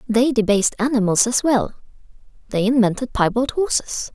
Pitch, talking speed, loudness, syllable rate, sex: 235 Hz, 130 wpm, -19 LUFS, 5.2 syllables/s, female